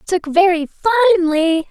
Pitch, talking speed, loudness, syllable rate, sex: 360 Hz, 140 wpm, -15 LUFS, 4.1 syllables/s, female